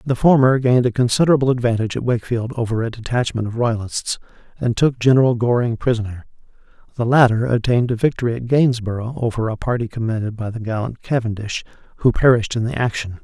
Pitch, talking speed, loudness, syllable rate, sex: 120 Hz, 170 wpm, -19 LUFS, 6.5 syllables/s, male